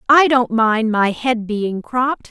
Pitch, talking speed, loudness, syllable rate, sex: 235 Hz, 180 wpm, -17 LUFS, 3.8 syllables/s, female